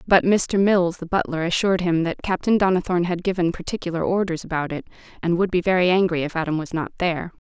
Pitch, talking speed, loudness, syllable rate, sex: 175 Hz, 210 wpm, -21 LUFS, 6.4 syllables/s, female